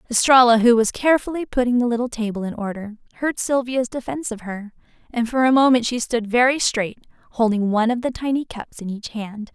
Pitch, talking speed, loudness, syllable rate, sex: 235 Hz, 200 wpm, -20 LUFS, 5.9 syllables/s, female